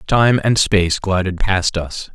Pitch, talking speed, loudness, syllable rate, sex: 95 Hz, 170 wpm, -16 LUFS, 4.0 syllables/s, male